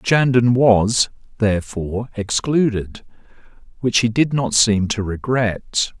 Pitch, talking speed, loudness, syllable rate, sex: 115 Hz, 110 wpm, -18 LUFS, 3.8 syllables/s, male